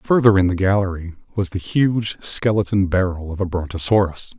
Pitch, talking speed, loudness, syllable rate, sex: 95 Hz, 165 wpm, -19 LUFS, 5.1 syllables/s, male